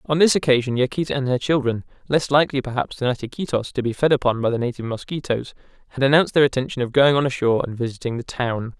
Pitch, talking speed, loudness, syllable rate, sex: 130 Hz, 225 wpm, -21 LUFS, 7.0 syllables/s, male